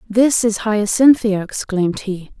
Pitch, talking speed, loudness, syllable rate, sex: 215 Hz, 125 wpm, -16 LUFS, 4.2 syllables/s, female